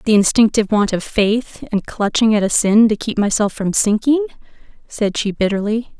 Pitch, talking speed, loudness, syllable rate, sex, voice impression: 215 Hz, 180 wpm, -16 LUFS, 5.0 syllables/s, female, feminine, adult-like, relaxed, slightly weak, soft, slightly muffled, slightly intellectual, calm, friendly, reassuring, elegant, kind, modest